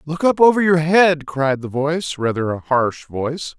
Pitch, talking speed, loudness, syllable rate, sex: 150 Hz, 200 wpm, -18 LUFS, 4.6 syllables/s, male